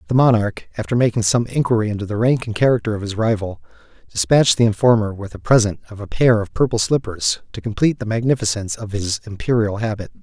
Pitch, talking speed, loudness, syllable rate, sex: 110 Hz, 200 wpm, -18 LUFS, 6.5 syllables/s, male